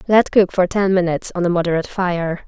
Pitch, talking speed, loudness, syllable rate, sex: 180 Hz, 220 wpm, -18 LUFS, 6.3 syllables/s, female